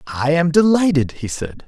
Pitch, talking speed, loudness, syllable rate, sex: 155 Hz, 180 wpm, -17 LUFS, 4.6 syllables/s, male